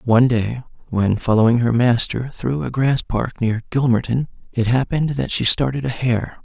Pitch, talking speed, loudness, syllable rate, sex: 120 Hz, 175 wpm, -19 LUFS, 5.0 syllables/s, male